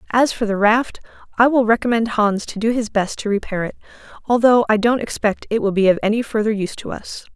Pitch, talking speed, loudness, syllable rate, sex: 220 Hz, 230 wpm, -18 LUFS, 5.9 syllables/s, female